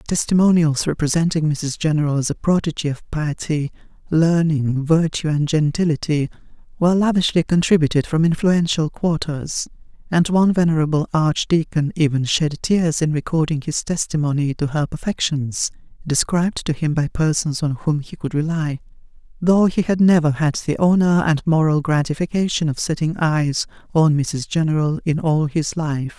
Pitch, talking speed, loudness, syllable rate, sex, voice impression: 155 Hz, 145 wpm, -19 LUFS, 4.5 syllables/s, female, very feminine, very middle-aged, very thin, relaxed, weak, dark, soft, slightly muffled, fluent, raspy, slightly cool, intellectual, refreshing, very calm, friendly, reassuring, very unique, elegant, slightly wild, sweet, slightly lively, very kind, very modest, light